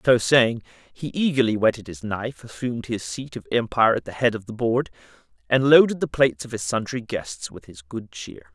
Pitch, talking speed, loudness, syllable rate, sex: 115 Hz, 210 wpm, -22 LUFS, 5.4 syllables/s, male